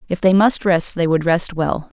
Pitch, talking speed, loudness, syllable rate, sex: 175 Hz, 240 wpm, -17 LUFS, 4.6 syllables/s, female